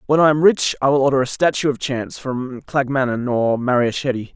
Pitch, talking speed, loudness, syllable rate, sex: 135 Hz, 205 wpm, -18 LUFS, 5.3 syllables/s, male